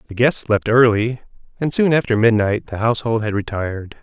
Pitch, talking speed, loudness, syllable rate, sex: 115 Hz, 180 wpm, -18 LUFS, 5.6 syllables/s, male